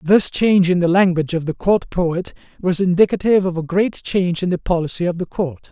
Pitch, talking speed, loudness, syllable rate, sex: 180 Hz, 220 wpm, -18 LUFS, 5.8 syllables/s, male